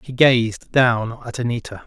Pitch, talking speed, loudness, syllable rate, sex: 120 Hz, 160 wpm, -19 LUFS, 4.1 syllables/s, male